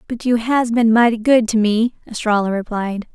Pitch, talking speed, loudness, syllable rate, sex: 225 Hz, 190 wpm, -17 LUFS, 4.9 syllables/s, female